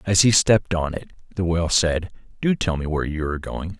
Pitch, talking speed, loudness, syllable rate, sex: 90 Hz, 235 wpm, -21 LUFS, 6.0 syllables/s, male